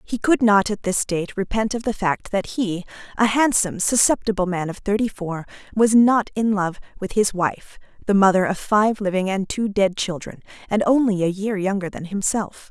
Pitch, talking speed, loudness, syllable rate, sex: 205 Hz, 200 wpm, -20 LUFS, 4.9 syllables/s, female